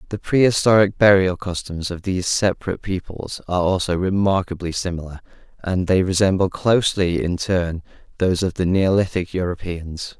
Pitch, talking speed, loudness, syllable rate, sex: 90 Hz, 135 wpm, -20 LUFS, 5.4 syllables/s, male